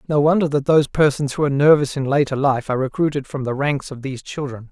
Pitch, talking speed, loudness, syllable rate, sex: 140 Hz, 240 wpm, -19 LUFS, 6.6 syllables/s, male